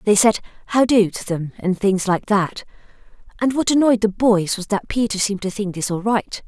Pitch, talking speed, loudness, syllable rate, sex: 205 Hz, 220 wpm, -19 LUFS, 5.2 syllables/s, female